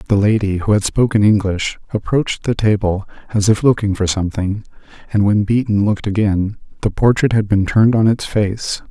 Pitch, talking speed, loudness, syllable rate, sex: 105 Hz, 180 wpm, -16 LUFS, 5.5 syllables/s, male